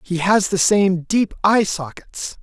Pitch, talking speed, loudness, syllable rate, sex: 190 Hz, 175 wpm, -17 LUFS, 3.7 syllables/s, male